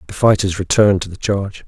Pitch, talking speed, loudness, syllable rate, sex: 95 Hz, 215 wpm, -16 LUFS, 6.7 syllables/s, male